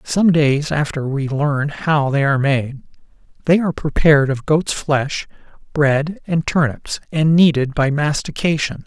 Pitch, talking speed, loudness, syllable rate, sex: 150 Hz, 150 wpm, -17 LUFS, 4.4 syllables/s, male